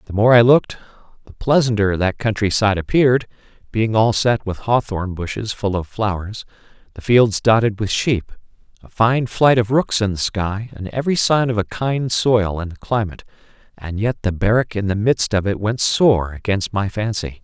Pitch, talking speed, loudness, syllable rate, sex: 110 Hz, 190 wpm, -18 LUFS, 4.9 syllables/s, male